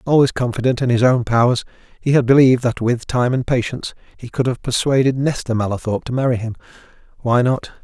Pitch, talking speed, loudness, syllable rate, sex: 125 Hz, 185 wpm, -18 LUFS, 6.3 syllables/s, male